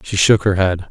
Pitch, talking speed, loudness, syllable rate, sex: 95 Hz, 265 wpm, -15 LUFS, 4.9 syllables/s, male